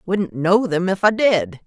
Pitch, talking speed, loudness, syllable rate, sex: 185 Hz, 215 wpm, -18 LUFS, 3.9 syllables/s, female